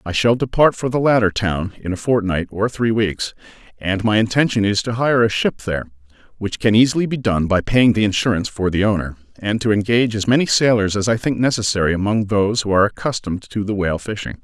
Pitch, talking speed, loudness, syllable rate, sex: 105 Hz, 220 wpm, -18 LUFS, 6.1 syllables/s, male